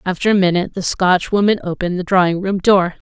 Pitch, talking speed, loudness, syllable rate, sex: 185 Hz, 195 wpm, -16 LUFS, 6.3 syllables/s, female